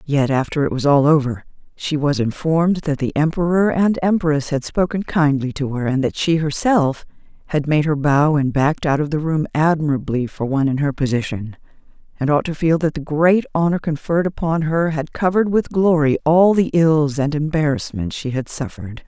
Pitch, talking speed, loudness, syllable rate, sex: 150 Hz, 195 wpm, -18 LUFS, 5.3 syllables/s, female